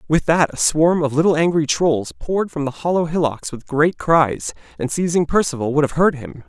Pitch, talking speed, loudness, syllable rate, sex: 155 Hz, 215 wpm, -18 LUFS, 5.1 syllables/s, male